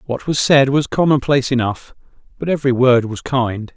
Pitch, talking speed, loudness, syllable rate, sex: 130 Hz, 190 wpm, -16 LUFS, 5.4 syllables/s, male